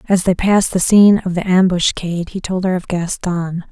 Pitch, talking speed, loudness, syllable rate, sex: 185 Hz, 210 wpm, -15 LUFS, 5.5 syllables/s, female